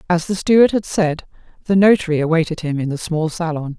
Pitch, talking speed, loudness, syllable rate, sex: 170 Hz, 205 wpm, -17 LUFS, 5.9 syllables/s, female